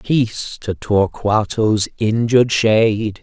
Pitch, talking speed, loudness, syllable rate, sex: 110 Hz, 95 wpm, -17 LUFS, 3.7 syllables/s, male